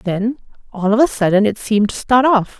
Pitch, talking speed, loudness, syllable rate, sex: 220 Hz, 230 wpm, -16 LUFS, 5.4 syllables/s, female